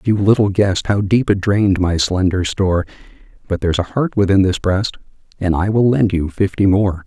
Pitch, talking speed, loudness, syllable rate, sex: 95 Hz, 205 wpm, -16 LUFS, 5.4 syllables/s, male